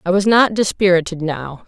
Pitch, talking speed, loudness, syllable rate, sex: 185 Hz, 180 wpm, -16 LUFS, 5.1 syllables/s, female